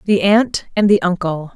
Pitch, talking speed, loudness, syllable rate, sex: 190 Hz, 195 wpm, -16 LUFS, 4.7 syllables/s, female